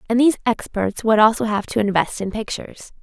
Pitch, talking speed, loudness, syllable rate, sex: 220 Hz, 200 wpm, -19 LUFS, 6.0 syllables/s, female